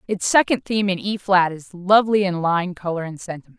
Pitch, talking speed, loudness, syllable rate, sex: 185 Hz, 215 wpm, -20 LUFS, 5.8 syllables/s, female